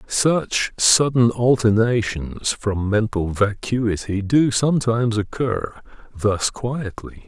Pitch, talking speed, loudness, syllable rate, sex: 115 Hz, 90 wpm, -20 LUFS, 3.4 syllables/s, male